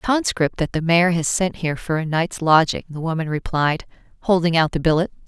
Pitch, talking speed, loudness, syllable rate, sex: 165 Hz, 215 wpm, -20 LUFS, 5.5 syllables/s, female